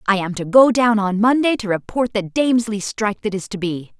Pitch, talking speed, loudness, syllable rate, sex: 215 Hz, 240 wpm, -18 LUFS, 5.5 syllables/s, female